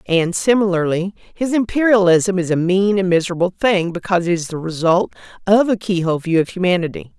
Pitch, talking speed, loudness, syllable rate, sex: 185 Hz, 175 wpm, -17 LUFS, 5.9 syllables/s, female